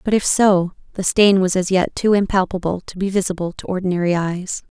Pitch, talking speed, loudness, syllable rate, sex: 185 Hz, 200 wpm, -18 LUFS, 5.6 syllables/s, female